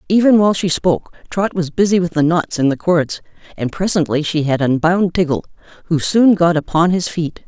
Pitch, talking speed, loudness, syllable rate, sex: 170 Hz, 200 wpm, -16 LUFS, 5.4 syllables/s, female